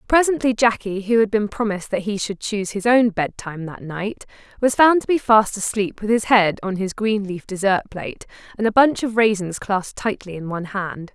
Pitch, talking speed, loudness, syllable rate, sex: 210 Hz, 215 wpm, -20 LUFS, 5.4 syllables/s, female